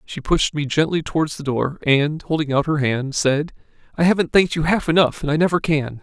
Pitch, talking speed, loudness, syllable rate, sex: 155 Hz, 230 wpm, -19 LUFS, 5.6 syllables/s, male